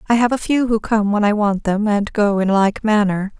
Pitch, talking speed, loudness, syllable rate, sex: 210 Hz, 265 wpm, -17 LUFS, 5.0 syllables/s, female